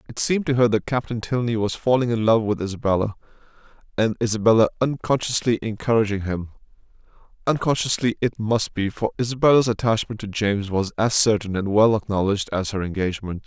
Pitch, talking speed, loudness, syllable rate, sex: 110 Hz, 160 wpm, -21 LUFS, 6.1 syllables/s, male